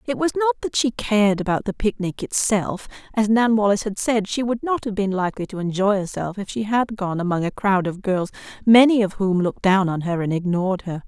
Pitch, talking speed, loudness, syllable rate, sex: 205 Hz, 235 wpm, -21 LUFS, 5.9 syllables/s, female